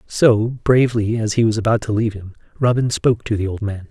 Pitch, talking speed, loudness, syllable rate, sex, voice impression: 110 Hz, 230 wpm, -18 LUFS, 6.0 syllables/s, male, masculine, adult-like, slightly tensed, slightly powerful, hard, slightly muffled, cool, intellectual, calm, wild, lively, kind